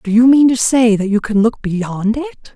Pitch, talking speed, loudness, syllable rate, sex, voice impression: 230 Hz, 260 wpm, -14 LUFS, 4.4 syllables/s, female, feminine, middle-aged, relaxed, slightly weak, soft, fluent, slightly raspy, intellectual, calm, friendly, reassuring, elegant, lively, kind, slightly modest